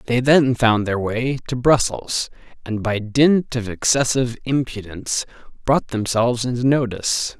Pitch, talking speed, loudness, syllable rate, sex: 120 Hz, 140 wpm, -19 LUFS, 4.5 syllables/s, male